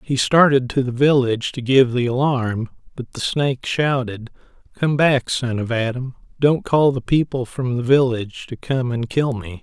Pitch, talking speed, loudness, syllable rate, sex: 130 Hz, 185 wpm, -19 LUFS, 4.7 syllables/s, male